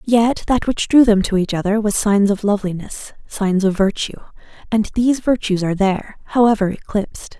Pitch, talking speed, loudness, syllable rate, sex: 210 Hz, 180 wpm, -17 LUFS, 5.6 syllables/s, female